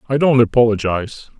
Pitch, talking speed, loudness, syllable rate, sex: 115 Hz, 130 wpm, -15 LUFS, 6.0 syllables/s, male